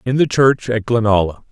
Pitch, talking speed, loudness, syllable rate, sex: 115 Hz, 200 wpm, -15 LUFS, 5.2 syllables/s, male